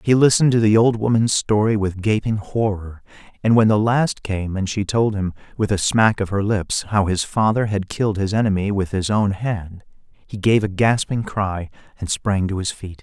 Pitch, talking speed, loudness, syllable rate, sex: 105 Hz, 210 wpm, -19 LUFS, 4.9 syllables/s, male